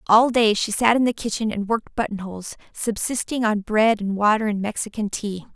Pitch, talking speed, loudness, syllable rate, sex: 215 Hz, 195 wpm, -22 LUFS, 5.5 syllables/s, female